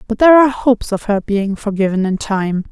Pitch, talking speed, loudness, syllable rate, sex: 215 Hz, 220 wpm, -15 LUFS, 6.0 syllables/s, female